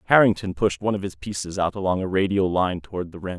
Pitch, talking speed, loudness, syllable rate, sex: 95 Hz, 250 wpm, -23 LUFS, 6.5 syllables/s, male